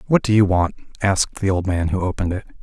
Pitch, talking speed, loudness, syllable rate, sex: 95 Hz, 250 wpm, -20 LUFS, 6.8 syllables/s, male